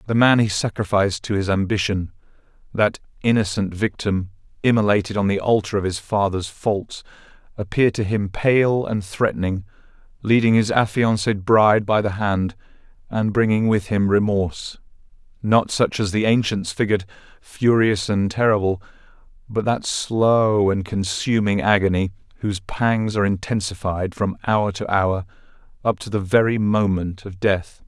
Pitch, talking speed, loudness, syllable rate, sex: 100 Hz, 140 wpm, -20 LUFS, 4.8 syllables/s, male